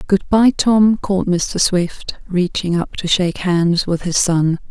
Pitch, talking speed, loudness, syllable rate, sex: 185 Hz, 180 wpm, -16 LUFS, 4.0 syllables/s, female